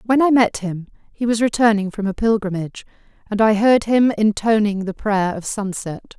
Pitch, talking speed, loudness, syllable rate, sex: 210 Hz, 185 wpm, -18 LUFS, 5.0 syllables/s, female